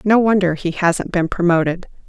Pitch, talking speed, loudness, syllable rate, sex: 180 Hz, 175 wpm, -17 LUFS, 5.0 syllables/s, female